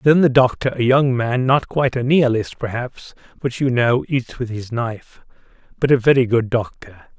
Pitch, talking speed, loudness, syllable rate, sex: 125 Hz, 190 wpm, -18 LUFS, 4.9 syllables/s, male